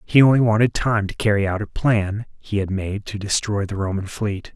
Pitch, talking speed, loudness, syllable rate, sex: 105 Hz, 225 wpm, -21 LUFS, 5.1 syllables/s, male